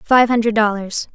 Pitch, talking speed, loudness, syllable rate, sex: 220 Hz, 155 wpm, -16 LUFS, 4.9 syllables/s, female